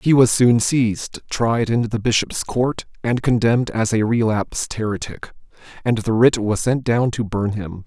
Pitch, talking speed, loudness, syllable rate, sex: 115 Hz, 185 wpm, -19 LUFS, 4.5 syllables/s, male